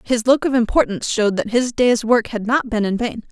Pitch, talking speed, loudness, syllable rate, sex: 235 Hz, 255 wpm, -18 LUFS, 5.7 syllables/s, female